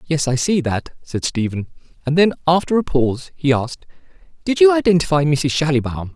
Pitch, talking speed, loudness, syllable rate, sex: 150 Hz, 175 wpm, -18 LUFS, 5.5 syllables/s, male